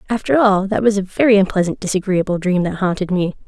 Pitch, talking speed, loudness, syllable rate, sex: 195 Hz, 205 wpm, -17 LUFS, 6.2 syllables/s, female